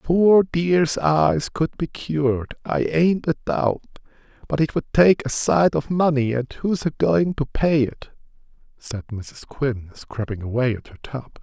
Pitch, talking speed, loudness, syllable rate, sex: 140 Hz, 175 wpm, -21 LUFS, 3.9 syllables/s, male